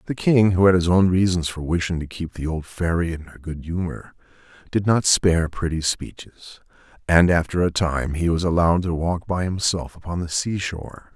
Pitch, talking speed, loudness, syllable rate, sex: 85 Hz, 205 wpm, -21 LUFS, 5.1 syllables/s, male